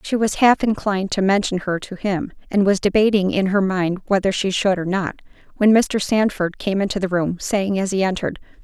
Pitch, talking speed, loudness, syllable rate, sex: 195 Hz, 215 wpm, -19 LUFS, 5.4 syllables/s, female